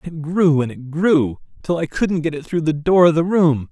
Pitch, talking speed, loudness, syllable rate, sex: 155 Hz, 260 wpm, -18 LUFS, 4.7 syllables/s, male